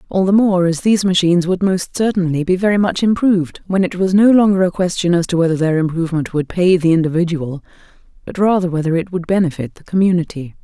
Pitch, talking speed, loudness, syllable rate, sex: 180 Hz, 210 wpm, -15 LUFS, 6.3 syllables/s, female